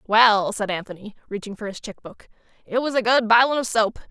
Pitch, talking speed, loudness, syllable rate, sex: 220 Hz, 205 wpm, -20 LUFS, 5.9 syllables/s, female